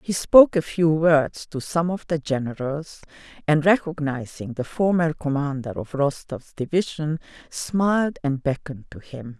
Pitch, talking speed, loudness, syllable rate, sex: 155 Hz, 145 wpm, -22 LUFS, 4.5 syllables/s, female